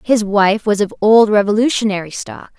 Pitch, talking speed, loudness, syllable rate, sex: 210 Hz, 160 wpm, -14 LUFS, 5.0 syllables/s, female